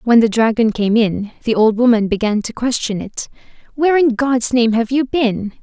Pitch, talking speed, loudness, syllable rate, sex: 230 Hz, 205 wpm, -16 LUFS, 4.9 syllables/s, female